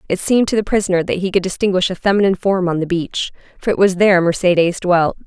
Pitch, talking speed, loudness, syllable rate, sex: 185 Hz, 240 wpm, -16 LUFS, 6.7 syllables/s, female